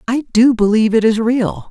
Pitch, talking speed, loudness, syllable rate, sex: 225 Hz, 210 wpm, -14 LUFS, 5.4 syllables/s, female